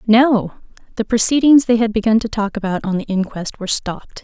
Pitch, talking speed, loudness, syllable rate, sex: 220 Hz, 200 wpm, -17 LUFS, 5.7 syllables/s, female